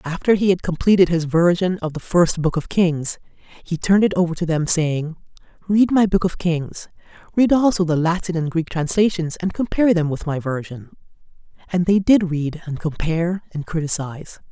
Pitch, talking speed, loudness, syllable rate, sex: 170 Hz, 180 wpm, -19 LUFS, 5.1 syllables/s, female